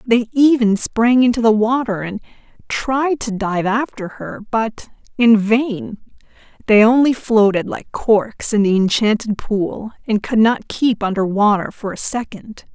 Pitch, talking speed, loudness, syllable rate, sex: 220 Hz, 155 wpm, -17 LUFS, 4.0 syllables/s, female